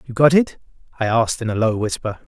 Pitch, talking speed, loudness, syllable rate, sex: 120 Hz, 230 wpm, -19 LUFS, 6.5 syllables/s, male